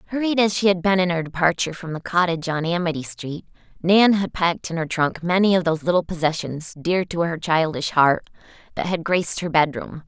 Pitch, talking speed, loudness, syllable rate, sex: 170 Hz, 205 wpm, -21 LUFS, 5.7 syllables/s, female